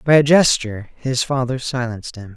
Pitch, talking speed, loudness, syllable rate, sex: 125 Hz, 180 wpm, -18 LUFS, 5.5 syllables/s, male